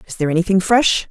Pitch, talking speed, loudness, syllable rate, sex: 195 Hz, 220 wpm, -16 LUFS, 7.2 syllables/s, female